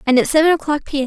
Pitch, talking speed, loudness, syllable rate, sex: 290 Hz, 335 wpm, -16 LUFS, 8.6 syllables/s, female